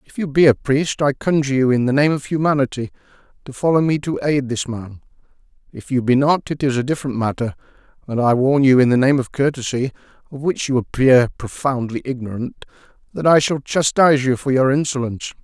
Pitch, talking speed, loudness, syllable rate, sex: 135 Hz, 200 wpm, -18 LUFS, 5.8 syllables/s, male